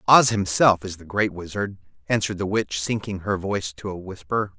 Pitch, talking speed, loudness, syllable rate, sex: 100 Hz, 195 wpm, -23 LUFS, 5.4 syllables/s, male